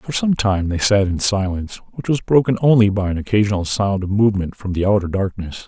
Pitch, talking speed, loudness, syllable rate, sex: 100 Hz, 220 wpm, -18 LUFS, 5.9 syllables/s, male